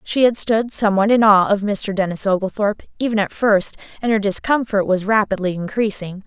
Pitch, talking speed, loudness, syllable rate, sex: 205 Hz, 180 wpm, -18 LUFS, 5.6 syllables/s, female